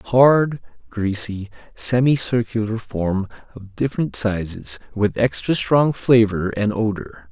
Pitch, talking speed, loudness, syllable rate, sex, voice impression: 110 Hz, 105 wpm, -20 LUFS, 3.8 syllables/s, male, masculine, slightly adult-like, slightly middle-aged, very thick, slightly thin, slightly relaxed, slightly powerful, dark, hard, clear, slightly muffled, fluent, cool, intellectual, very refreshing, sincere, very mature, friendly, reassuring, unique, slightly elegant, wild, sweet, kind, slightly intense, slightly modest, very light